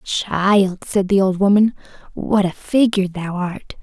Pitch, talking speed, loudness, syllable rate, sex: 195 Hz, 155 wpm, -18 LUFS, 3.9 syllables/s, female